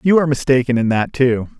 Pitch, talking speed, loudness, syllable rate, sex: 130 Hz, 225 wpm, -16 LUFS, 6.3 syllables/s, male